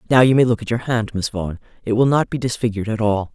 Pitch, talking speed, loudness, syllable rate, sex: 115 Hz, 285 wpm, -19 LUFS, 6.9 syllables/s, female